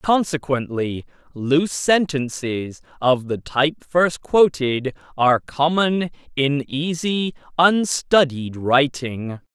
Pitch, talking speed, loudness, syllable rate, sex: 145 Hz, 90 wpm, -20 LUFS, 3.5 syllables/s, male